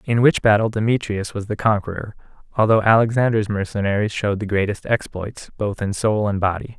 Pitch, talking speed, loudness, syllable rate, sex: 105 Hz, 170 wpm, -20 LUFS, 5.6 syllables/s, male